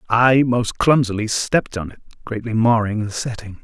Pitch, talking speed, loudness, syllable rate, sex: 115 Hz, 165 wpm, -19 LUFS, 5.0 syllables/s, male